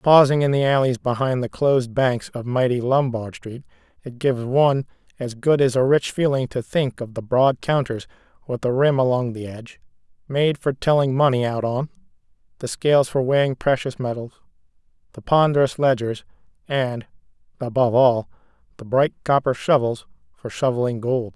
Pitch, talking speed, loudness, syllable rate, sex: 130 Hz, 165 wpm, -21 LUFS, 5.2 syllables/s, male